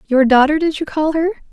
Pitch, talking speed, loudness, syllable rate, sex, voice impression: 300 Hz, 235 wpm, -15 LUFS, 5.5 syllables/s, female, young, very thin, tensed, slightly weak, bright, soft, very clear, fluent, raspy, very cute, intellectual, very refreshing, sincere, calm, very friendly, very reassuring, very unique, very elegant, very sweet, lively, very kind, slightly modest, light